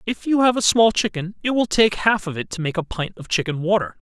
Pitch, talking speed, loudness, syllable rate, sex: 190 Hz, 280 wpm, -20 LUFS, 5.8 syllables/s, male